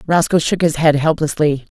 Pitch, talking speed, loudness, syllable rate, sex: 155 Hz, 170 wpm, -16 LUFS, 5.2 syllables/s, female